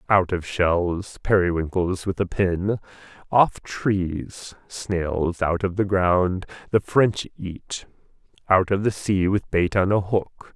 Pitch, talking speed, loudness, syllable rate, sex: 95 Hz, 150 wpm, -23 LUFS, 3.3 syllables/s, male